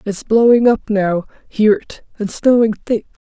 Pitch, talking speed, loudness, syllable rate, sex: 220 Hz, 165 wpm, -15 LUFS, 4.3 syllables/s, female